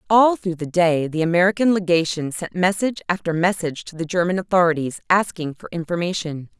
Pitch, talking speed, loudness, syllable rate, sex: 175 Hz, 165 wpm, -20 LUFS, 5.9 syllables/s, female